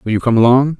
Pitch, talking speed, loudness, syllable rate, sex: 125 Hz, 300 wpm, -12 LUFS, 7.3 syllables/s, male